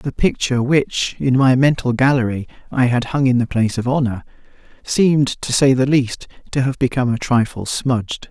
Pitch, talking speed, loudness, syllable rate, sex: 130 Hz, 190 wpm, -17 LUFS, 5.3 syllables/s, male